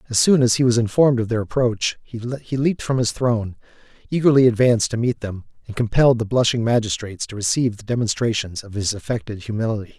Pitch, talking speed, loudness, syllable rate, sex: 115 Hz, 190 wpm, -20 LUFS, 6.5 syllables/s, male